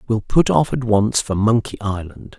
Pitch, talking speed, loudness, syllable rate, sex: 105 Hz, 200 wpm, -18 LUFS, 4.6 syllables/s, male